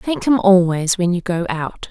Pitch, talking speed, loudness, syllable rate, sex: 185 Hz, 220 wpm, -17 LUFS, 4.4 syllables/s, female